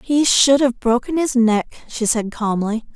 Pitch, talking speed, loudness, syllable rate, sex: 240 Hz, 185 wpm, -17 LUFS, 4.0 syllables/s, female